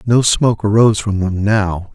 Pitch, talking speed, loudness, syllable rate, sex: 105 Hz, 185 wpm, -14 LUFS, 4.9 syllables/s, male